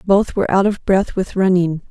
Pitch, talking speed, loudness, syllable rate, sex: 190 Hz, 220 wpm, -17 LUFS, 5.4 syllables/s, female